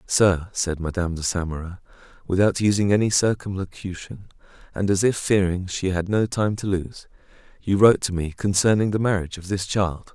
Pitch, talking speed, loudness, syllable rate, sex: 95 Hz, 175 wpm, -22 LUFS, 5.4 syllables/s, male